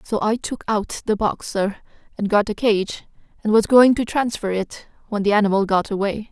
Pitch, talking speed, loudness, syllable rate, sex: 210 Hz, 210 wpm, -20 LUFS, 5.0 syllables/s, female